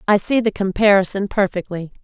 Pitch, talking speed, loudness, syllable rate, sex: 200 Hz, 150 wpm, -18 LUFS, 5.6 syllables/s, female